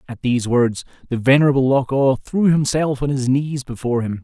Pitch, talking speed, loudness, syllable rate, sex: 130 Hz, 200 wpm, -18 LUFS, 5.5 syllables/s, male